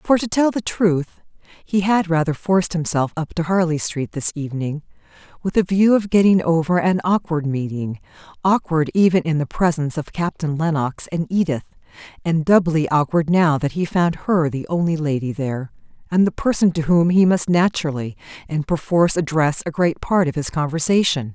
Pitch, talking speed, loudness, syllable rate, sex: 165 Hz, 180 wpm, -19 LUFS, 5.3 syllables/s, female